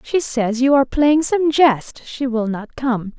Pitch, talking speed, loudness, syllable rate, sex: 260 Hz, 205 wpm, -17 LUFS, 4.1 syllables/s, female